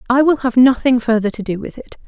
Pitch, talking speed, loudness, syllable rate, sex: 240 Hz, 260 wpm, -15 LUFS, 6.2 syllables/s, female